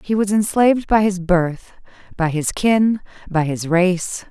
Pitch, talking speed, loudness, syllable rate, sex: 190 Hz, 165 wpm, -18 LUFS, 3.9 syllables/s, female